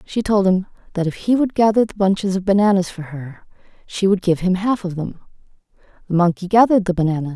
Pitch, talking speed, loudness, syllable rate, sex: 190 Hz, 210 wpm, -18 LUFS, 6.1 syllables/s, female